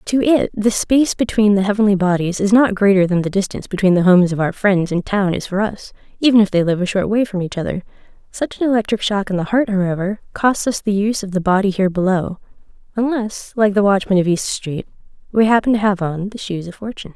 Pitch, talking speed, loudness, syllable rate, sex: 200 Hz, 240 wpm, -17 LUFS, 6.1 syllables/s, female